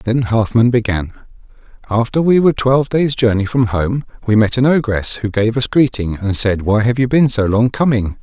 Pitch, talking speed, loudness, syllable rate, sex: 115 Hz, 205 wpm, -15 LUFS, 5.0 syllables/s, male